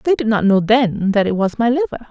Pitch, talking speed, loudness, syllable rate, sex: 225 Hz, 285 wpm, -16 LUFS, 5.6 syllables/s, female